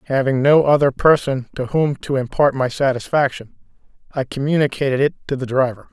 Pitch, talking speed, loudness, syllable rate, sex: 135 Hz, 160 wpm, -18 LUFS, 5.6 syllables/s, male